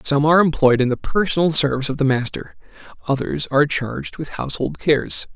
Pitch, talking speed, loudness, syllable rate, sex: 145 Hz, 180 wpm, -19 LUFS, 6.2 syllables/s, male